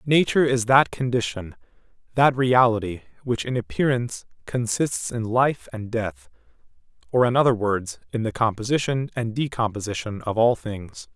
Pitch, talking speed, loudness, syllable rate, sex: 120 Hz, 140 wpm, -23 LUFS, 4.9 syllables/s, male